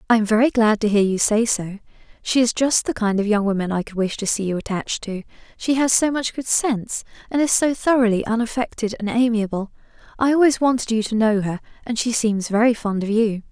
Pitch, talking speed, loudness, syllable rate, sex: 225 Hz, 230 wpm, -20 LUFS, 5.8 syllables/s, female